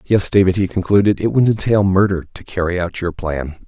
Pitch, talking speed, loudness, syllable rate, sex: 95 Hz, 210 wpm, -17 LUFS, 5.5 syllables/s, male